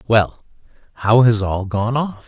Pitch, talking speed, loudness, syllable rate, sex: 110 Hz, 160 wpm, -17 LUFS, 3.9 syllables/s, male